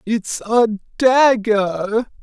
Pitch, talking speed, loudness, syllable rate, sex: 225 Hz, 80 wpm, -17 LUFS, 2.3 syllables/s, male